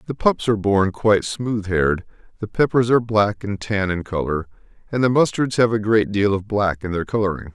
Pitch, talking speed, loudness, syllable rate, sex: 105 Hz, 215 wpm, -20 LUFS, 5.5 syllables/s, male